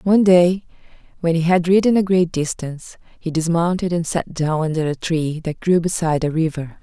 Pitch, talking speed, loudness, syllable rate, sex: 170 Hz, 195 wpm, -19 LUFS, 5.3 syllables/s, female